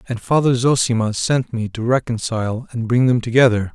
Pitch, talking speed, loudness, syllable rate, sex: 120 Hz, 175 wpm, -18 LUFS, 5.4 syllables/s, male